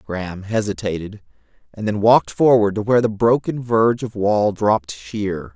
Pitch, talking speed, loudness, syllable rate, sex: 105 Hz, 160 wpm, -19 LUFS, 5.1 syllables/s, male